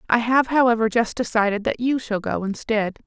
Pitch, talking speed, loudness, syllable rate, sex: 230 Hz, 195 wpm, -21 LUFS, 5.3 syllables/s, female